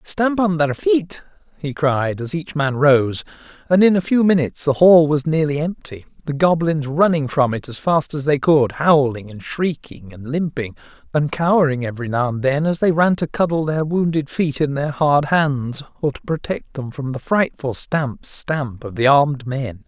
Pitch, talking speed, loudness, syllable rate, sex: 145 Hz, 200 wpm, -18 LUFS, 4.6 syllables/s, male